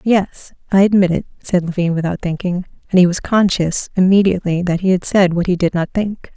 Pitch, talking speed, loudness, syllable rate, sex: 185 Hz, 210 wpm, -16 LUFS, 5.5 syllables/s, female